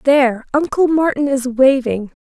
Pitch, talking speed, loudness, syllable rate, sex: 270 Hz, 135 wpm, -15 LUFS, 4.5 syllables/s, female